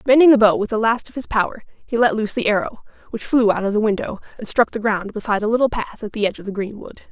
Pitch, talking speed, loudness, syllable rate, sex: 220 Hz, 285 wpm, -19 LUFS, 6.8 syllables/s, female